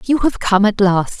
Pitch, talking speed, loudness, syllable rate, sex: 215 Hz, 250 wpm, -15 LUFS, 4.6 syllables/s, female